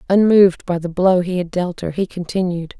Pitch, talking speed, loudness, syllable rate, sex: 180 Hz, 215 wpm, -17 LUFS, 5.4 syllables/s, female